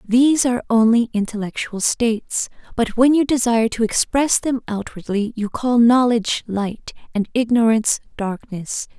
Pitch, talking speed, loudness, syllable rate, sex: 230 Hz, 135 wpm, -19 LUFS, 4.8 syllables/s, female